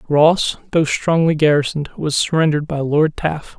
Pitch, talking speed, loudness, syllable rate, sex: 150 Hz, 150 wpm, -17 LUFS, 5.6 syllables/s, male